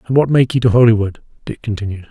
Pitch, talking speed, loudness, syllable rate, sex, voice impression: 115 Hz, 230 wpm, -15 LUFS, 7.0 syllables/s, male, masculine, very adult-like, slightly muffled, slightly sincere, calm, reassuring